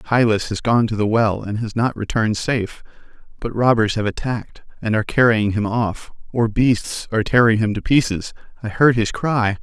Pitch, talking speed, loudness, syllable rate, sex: 110 Hz, 195 wpm, -19 LUFS, 5.3 syllables/s, male